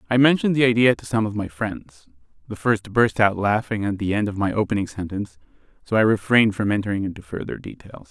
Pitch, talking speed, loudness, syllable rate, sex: 105 Hz, 215 wpm, -21 LUFS, 6.2 syllables/s, male